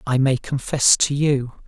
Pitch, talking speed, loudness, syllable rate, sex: 135 Hz, 180 wpm, -19 LUFS, 4.0 syllables/s, male